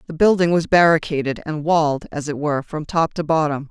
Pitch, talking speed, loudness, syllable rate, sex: 155 Hz, 210 wpm, -19 LUFS, 5.8 syllables/s, female